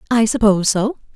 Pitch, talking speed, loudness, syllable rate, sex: 215 Hz, 155 wpm, -16 LUFS, 6.3 syllables/s, female